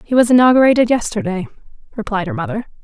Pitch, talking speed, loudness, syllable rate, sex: 225 Hz, 150 wpm, -15 LUFS, 7.0 syllables/s, female